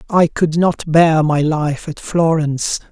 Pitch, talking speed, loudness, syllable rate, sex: 160 Hz, 165 wpm, -16 LUFS, 3.8 syllables/s, male